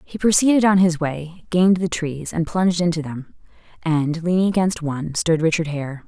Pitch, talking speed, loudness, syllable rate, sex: 170 Hz, 190 wpm, -20 LUFS, 5.1 syllables/s, female